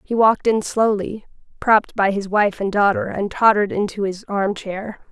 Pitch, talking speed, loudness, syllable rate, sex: 205 Hz, 190 wpm, -19 LUFS, 5.0 syllables/s, female